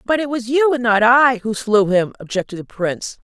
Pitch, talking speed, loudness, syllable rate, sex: 230 Hz, 235 wpm, -17 LUFS, 5.2 syllables/s, female